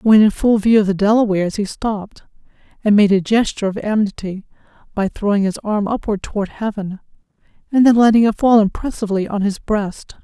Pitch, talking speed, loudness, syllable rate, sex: 210 Hz, 180 wpm, -17 LUFS, 5.7 syllables/s, female